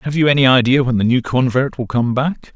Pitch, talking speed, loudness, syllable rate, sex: 130 Hz, 260 wpm, -15 LUFS, 5.8 syllables/s, male